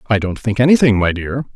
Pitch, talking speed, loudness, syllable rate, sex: 115 Hz, 230 wpm, -15 LUFS, 6.3 syllables/s, male